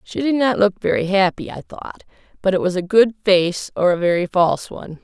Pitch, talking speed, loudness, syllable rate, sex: 190 Hz, 225 wpm, -18 LUFS, 5.5 syllables/s, female